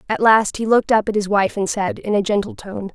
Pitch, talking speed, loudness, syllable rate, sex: 210 Hz, 285 wpm, -18 LUFS, 5.8 syllables/s, female